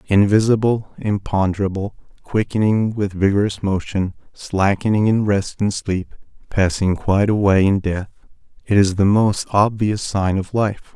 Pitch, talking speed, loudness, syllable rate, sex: 100 Hz, 130 wpm, -18 LUFS, 4.5 syllables/s, male